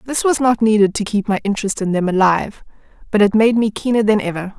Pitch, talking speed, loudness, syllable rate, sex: 210 Hz, 235 wpm, -16 LUFS, 6.4 syllables/s, female